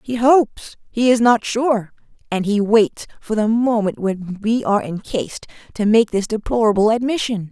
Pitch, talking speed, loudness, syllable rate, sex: 220 Hz, 160 wpm, -18 LUFS, 4.8 syllables/s, female